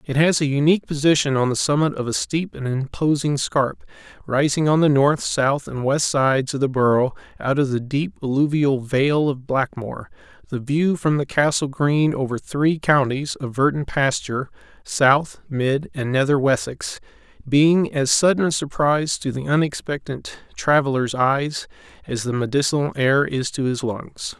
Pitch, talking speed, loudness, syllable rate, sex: 140 Hz, 160 wpm, -20 LUFS, 4.6 syllables/s, male